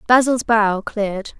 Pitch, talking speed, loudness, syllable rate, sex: 220 Hz, 130 wpm, -18 LUFS, 4.2 syllables/s, female